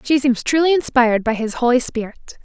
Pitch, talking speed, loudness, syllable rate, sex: 255 Hz, 195 wpm, -17 LUFS, 5.6 syllables/s, female